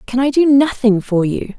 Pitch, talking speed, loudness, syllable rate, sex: 245 Hz, 225 wpm, -14 LUFS, 4.9 syllables/s, female